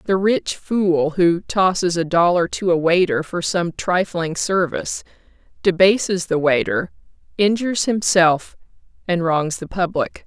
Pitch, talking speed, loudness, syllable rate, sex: 180 Hz, 135 wpm, -19 LUFS, 4.2 syllables/s, female